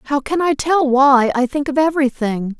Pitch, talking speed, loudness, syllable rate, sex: 275 Hz, 230 wpm, -16 LUFS, 4.8 syllables/s, female